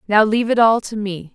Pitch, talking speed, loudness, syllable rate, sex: 210 Hz, 270 wpm, -17 LUFS, 5.9 syllables/s, female